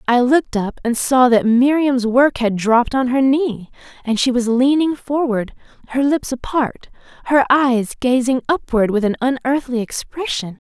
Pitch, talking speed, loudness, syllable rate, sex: 255 Hz, 165 wpm, -17 LUFS, 4.5 syllables/s, female